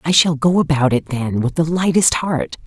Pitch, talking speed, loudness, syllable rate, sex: 150 Hz, 225 wpm, -17 LUFS, 4.8 syllables/s, female